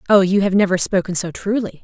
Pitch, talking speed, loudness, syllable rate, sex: 195 Hz, 230 wpm, -17 LUFS, 6.1 syllables/s, female